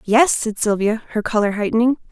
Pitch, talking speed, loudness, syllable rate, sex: 225 Hz, 170 wpm, -18 LUFS, 5.3 syllables/s, female